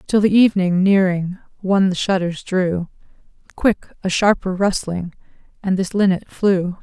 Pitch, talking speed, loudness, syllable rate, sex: 190 Hz, 140 wpm, -18 LUFS, 4.7 syllables/s, female